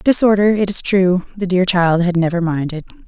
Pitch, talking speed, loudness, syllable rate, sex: 185 Hz, 195 wpm, -15 LUFS, 5.1 syllables/s, female